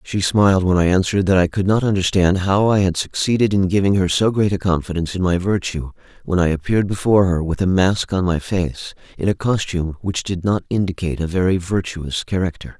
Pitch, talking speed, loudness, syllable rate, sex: 95 Hz, 215 wpm, -18 LUFS, 6.0 syllables/s, male